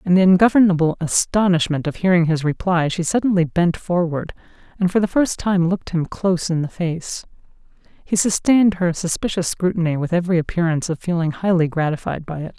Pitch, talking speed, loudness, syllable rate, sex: 175 Hz, 175 wpm, -19 LUFS, 5.9 syllables/s, female